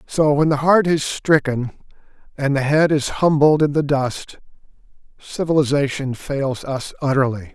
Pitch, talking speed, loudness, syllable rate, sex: 140 Hz, 145 wpm, -18 LUFS, 4.5 syllables/s, male